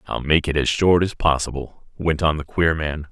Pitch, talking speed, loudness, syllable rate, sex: 80 Hz, 230 wpm, -20 LUFS, 4.9 syllables/s, male